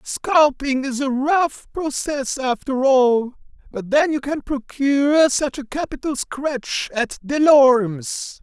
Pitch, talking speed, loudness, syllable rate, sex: 270 Hz, 135 wpm, -19 LUFS, 3.5 syllables/s, male